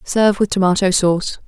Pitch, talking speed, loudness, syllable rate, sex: 190 Hz, 165 wpm, -16 LUFS, 6.0 syllables/s, female